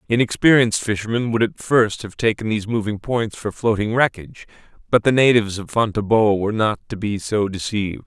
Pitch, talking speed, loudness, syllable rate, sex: 110 Hz, 180 wpm, -19 LUFS, 5.8 syllables/s, male